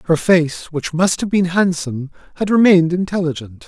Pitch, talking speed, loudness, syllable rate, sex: 170 Hz, 165 wpm, -16 LUFS, 5.4 syllables/s, male